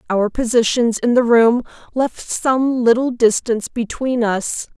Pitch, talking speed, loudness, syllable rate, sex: 235 Hz, 140 wpm, -17 LUFS, 4.1 syllables/s, female